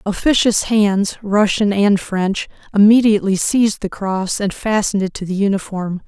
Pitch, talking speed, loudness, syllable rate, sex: 200 Hz, 150 wpm, -16 LUFS, 4.8 syllables/s, female